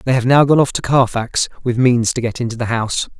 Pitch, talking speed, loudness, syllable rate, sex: 125 Hz, 265 wpm, -16 LUFS, 6.0 syllables/s, male